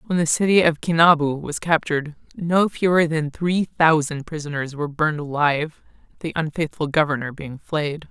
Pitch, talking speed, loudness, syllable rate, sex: 155 Hz, 155 wpm, -21 LUFS, 5.2 syllables/s, female